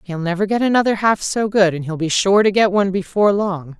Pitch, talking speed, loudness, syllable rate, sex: 195 Hz, 255 wpm, -17 LUFS, 6.0 syllables/s, female